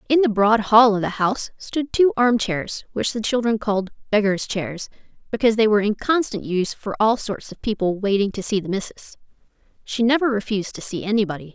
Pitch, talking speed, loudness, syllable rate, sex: 215 Hz, 195 wpm, -21 LUFS, 5.8 syllables/s, female